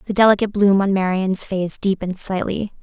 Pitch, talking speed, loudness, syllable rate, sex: 195 Hz, 170 wpm, -18 LUFS, 5.8 syllables/s, female